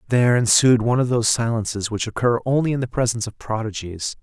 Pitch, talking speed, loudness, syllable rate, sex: 115 Hz, 200 wpm, -20 LUFS, 6.5 syllables/s, male